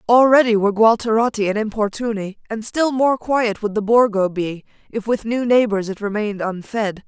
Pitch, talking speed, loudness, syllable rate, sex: 220 Hz, 170 wpm, -18 LUFS, 5.2 syllables/s, female